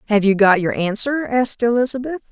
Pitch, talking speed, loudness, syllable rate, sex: 230 Hz, 180 wpm, -17 LUFS, 5.9 syllables/s, female